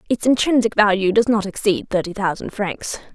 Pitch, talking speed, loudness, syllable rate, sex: 205 Hz, 170 wpm, -19 LUFS, 5.3 syllables/s, female